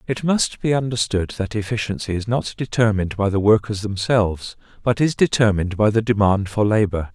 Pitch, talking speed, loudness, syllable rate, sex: 105 Hz, 175 wpm, -20 LUFS, 5.6 syllables/s, male